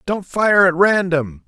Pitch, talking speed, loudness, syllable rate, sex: 180 Hz, 165 wpm, -16 LUFS, 3.7 syllables/s, male